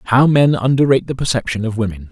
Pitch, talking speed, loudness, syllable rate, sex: 120 Hz, 200 wpm, -15 LUFS, 6.9 syllables/s, male